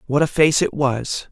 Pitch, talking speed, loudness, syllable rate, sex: 145 Hz, 230 wpm, -18 LUFS, 4.4 syllables/s, male